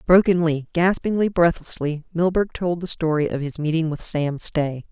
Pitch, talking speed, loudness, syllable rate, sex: 165 Hz, 160 wpm, -21 LUFS, 4.8 syllables/s, female